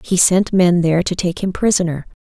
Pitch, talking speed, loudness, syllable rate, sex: 180 Hz, 215 wpm, -16 LUFS, 5.5 syllables/s, female